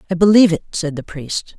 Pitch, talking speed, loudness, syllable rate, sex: 175 Hz, 230 wpm, -16 LUFS, 6.4 syllables/s, female